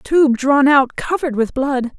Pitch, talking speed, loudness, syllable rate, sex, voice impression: 270 Hz, 180 wpm, -16 LUFS, 4.2 syllables/s, female, feminine, adult-like, slightly relaxed, slightly soft, muffled, intellectual, calm, reassuring, slightly elegant, slightly lively